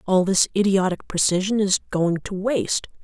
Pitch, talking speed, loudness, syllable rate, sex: 190 Hz, 160 wpm, -21 LUFS, 5.1 syllables/s, female